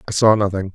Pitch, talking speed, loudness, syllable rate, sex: 100 Hz, 245 wpm, -17 LUFS, 7.0 syllables/s, male